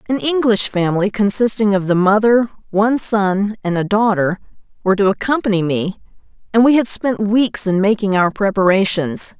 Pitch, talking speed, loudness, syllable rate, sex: 205 Hz, 160 wpm, -16 LUFS, 5.2 syllables/s, female